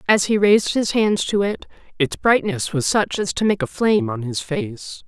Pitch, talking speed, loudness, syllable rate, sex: 205 Hz, 225 wpm, -19 LUFS, 4.8 syllables/s, female